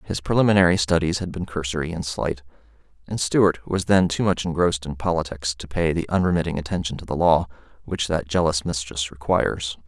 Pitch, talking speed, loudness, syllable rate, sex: 80 Hz, 180 wpm, -22 LUFS, 5.7 syllables/s, male